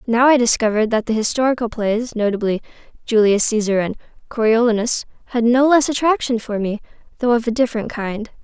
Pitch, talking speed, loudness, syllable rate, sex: 230 Hz, 165 wpm, -18 LUFS, 5.9 syllables/s, female